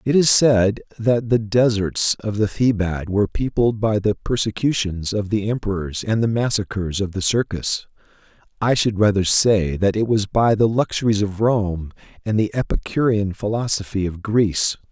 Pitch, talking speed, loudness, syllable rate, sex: 105 Hz, 165 wpm, -20 LUFS, 4.7 syllables/s, male